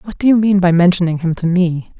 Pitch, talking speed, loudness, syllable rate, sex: 180 Hz, 270 wpm, -14 LUFS, 5.7 syllables/s, female